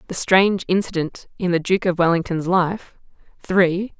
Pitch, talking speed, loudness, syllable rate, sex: 180 Hz, 150 wpm, -19 LUFS, 4.6 syllables/s, female